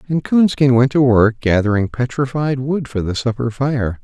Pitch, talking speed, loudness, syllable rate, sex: 130 Hz, 180 wpm, -16 LUFS, 4.7 syllables/s, male